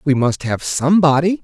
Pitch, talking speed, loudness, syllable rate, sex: 155 Hz, 170 wpm, -16 LUFS, 5.3 syllables/s, male